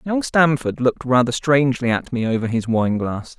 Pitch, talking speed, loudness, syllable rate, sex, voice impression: 130 Hz, 195 wpm, -19 LUFS, 5.2 syllables/s, male, masculine, adult-like, tensed, powerful, bright, clear, fluent, intellectual, sincere, calm, friendly, slightly wild, lively, slightly kind